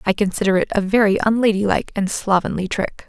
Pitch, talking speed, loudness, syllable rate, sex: 200 Hz, 175 wpm, -19 LUFS, 6.1 syllables/s, female